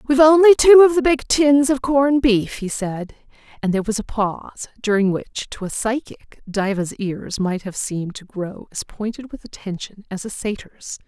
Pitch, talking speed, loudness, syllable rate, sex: 230 Hz, 195 wpm, -18 LUFS, 4.8 syllables/s, female